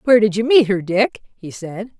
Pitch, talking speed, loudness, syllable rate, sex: 210 Hz, 240 wpm, -16 LUFS, 5.1 syllables/s, female